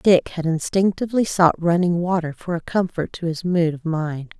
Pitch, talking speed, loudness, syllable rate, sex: 170 Hz, 190 wpm, -21 LUFS, 4.9 syllables/s, female